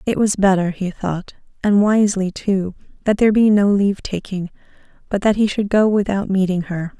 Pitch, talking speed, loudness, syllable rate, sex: 195 Hz, 190 wpm, -18 LUFS, 5.3 syllables/s, female